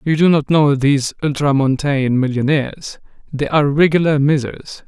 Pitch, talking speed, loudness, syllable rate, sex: 145 Hz, 135 wpm, -15 LUFS, 5.3 syllables/s, male